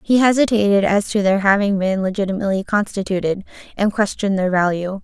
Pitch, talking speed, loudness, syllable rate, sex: 200 Hz, 155 wpm, -18 LUFS, 6.1 syllables/s, female